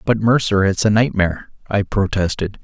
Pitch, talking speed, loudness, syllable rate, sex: 100 Hz, 160 wpm, -17 LUFS, 5.2 syllables/s, male